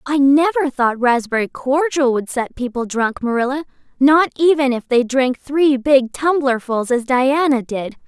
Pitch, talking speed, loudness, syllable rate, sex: 265 Hz, 150 wpm, -17 LUFS, 4.3 syllables/s, female